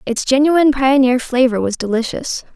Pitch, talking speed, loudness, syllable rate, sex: 260 Hz, 140 wpm, -15 LUFS, 5.1 syllables/s, female